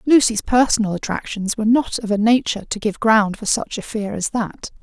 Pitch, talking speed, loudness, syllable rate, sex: 220 Hz, 210 wpm, -19 LUFS, 5.4 syllables/s, female